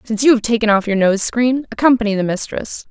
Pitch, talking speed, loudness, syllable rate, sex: 225 Hz, 225 wpm, -16 LUFS, 6.2 syllables/s, female